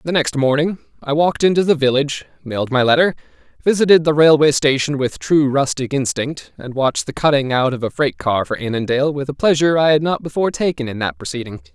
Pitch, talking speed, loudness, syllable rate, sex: 140 Hz, 210 wpm, -17 LUFS, 6.2 syllables/s, male